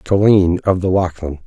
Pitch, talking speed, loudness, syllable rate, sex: 90 Hz, 165 wpm, -15 LUFS, 5.0 syllables/s, male